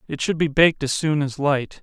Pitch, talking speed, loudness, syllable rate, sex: 145 Hz, 265 wpm, -20 LUFS, 5.4 syllables/s, male